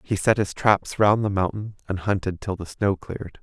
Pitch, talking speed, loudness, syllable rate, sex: 100 Hz, 225 wpm, -23 LUFS, 5.0 syllables/s, male